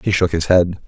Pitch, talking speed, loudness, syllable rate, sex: 90 Hz, 275 wpm, -16 LUFS, 5.5 syllables/s, male